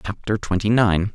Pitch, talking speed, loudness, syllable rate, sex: 105 Hz, 155 wpm, -20 LUFS, 5.0 syllables/s, male